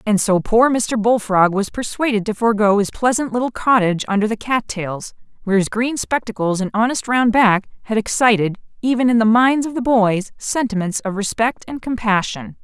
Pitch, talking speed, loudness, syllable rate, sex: 220 Hz, 185 wpm, -18 LUFS, 5.2 syllables/s, female